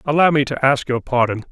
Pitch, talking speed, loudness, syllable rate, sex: 135 Hz, 240 wpm, -17 LUFS, 6.0 syllables/s, male